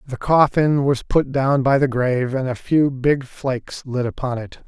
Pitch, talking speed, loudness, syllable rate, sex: 135 Hz, 205 wpm, -19 LUFS, 4.4 syllables/s, male